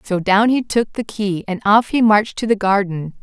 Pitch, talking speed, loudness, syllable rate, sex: 205 Hz, 240 wpm, -17 LUFS, 5.0 syllables/s, female